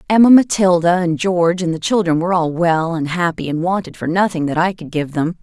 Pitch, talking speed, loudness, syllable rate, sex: 175 Hz, 230 wpm, -16 LUFS, 5.7 syllables/s, female